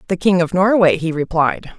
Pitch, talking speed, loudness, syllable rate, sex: 175 Hz, 200 wpm, -16 LUFS, 5.3 syllables/s, female